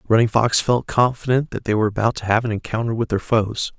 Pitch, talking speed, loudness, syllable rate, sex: 115 Hz, 240 wpm, -20 LUFS, 6.2 syllables/s, male